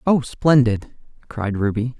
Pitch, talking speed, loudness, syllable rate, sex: 120 Hz, 120 wpm, -19 LUFS, 3.9 syllables/s, male